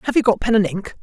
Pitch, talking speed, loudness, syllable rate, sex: 220 Hz, 355 wpm, -18 LUFS, 7.4 syllables/s, female